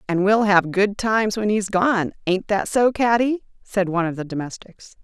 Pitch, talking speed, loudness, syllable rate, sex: 200 Hz, 205 wpm, -20 LUFS, 4.9 syllables/s, female